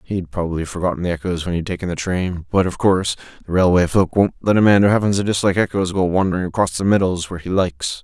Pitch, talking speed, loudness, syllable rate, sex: 90 Hz, 245 wpm, -18 LUFS, 6.8 syllables/s, male